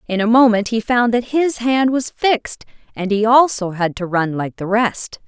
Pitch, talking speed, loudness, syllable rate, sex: 225 Hz, 215 wpm, -17 LUFS, 4.6 syllables/s, female